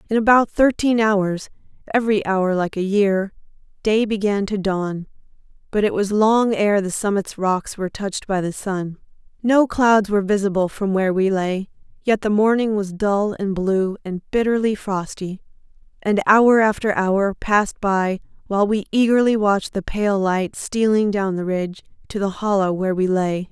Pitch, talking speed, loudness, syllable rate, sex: 200 Hz, 165 wpm, -19 LUFS, 4.7 syllables/s, female